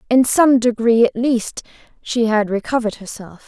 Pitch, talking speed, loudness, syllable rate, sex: 235 Hz, 155 wpm, -16 LUFS, 4.9 syllables/s, female